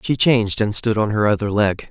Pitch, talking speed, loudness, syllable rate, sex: 110 Hz, 250 wpm, -18 LUFS, 5.5 syllables/s, male